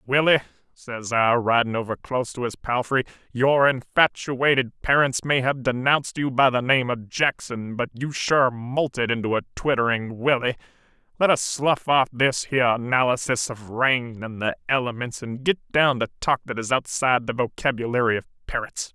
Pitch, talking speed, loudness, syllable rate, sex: 125 Hz, 165 wpm, -22 LUFS, 5.1 syllables/s, male